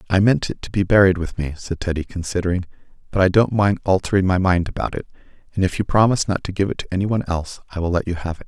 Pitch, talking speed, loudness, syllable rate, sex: 95 Hz, 270 wpm, -20 LUFS, 7.2 syllables/s, male